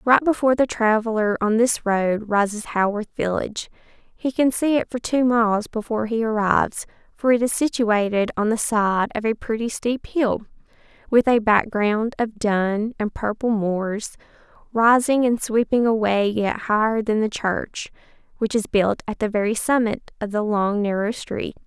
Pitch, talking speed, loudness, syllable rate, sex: 220 Hz, 170 wpm, -21 LUFS, 4.6 syllables/s, female